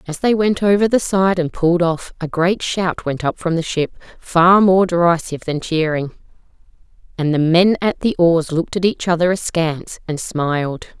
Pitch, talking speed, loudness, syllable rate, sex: 175 Hz, 190 wpm, -17 LUFS, 5.0 syllables/s, female